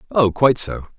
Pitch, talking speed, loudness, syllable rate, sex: 110 Hz, 180 wpm, -18 LUFS, 5.8 syllables/s, male